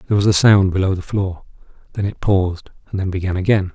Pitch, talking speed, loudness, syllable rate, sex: 95 Hz, 225 wpm, -18 LUFS, 6.7 syllables/s, male